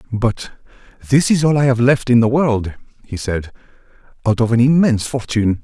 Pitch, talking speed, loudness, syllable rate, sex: 120 Hz, 180 wpm, -16 LUFS, 5.4 syllables/s, male